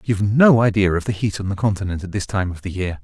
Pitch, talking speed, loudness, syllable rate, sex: 100 Hz, 295 wpm, -19 LUFS, 6.5 syllables/s, male